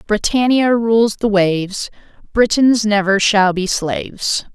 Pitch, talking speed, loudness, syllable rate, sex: 210 Hz, 120 wpm, -15 LUFS, 3.8 syllables/s, female